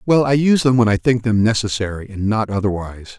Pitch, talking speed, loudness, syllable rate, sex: 110 Hz, 225 wpm, -17 LUFS, 6.2 syllables/s, male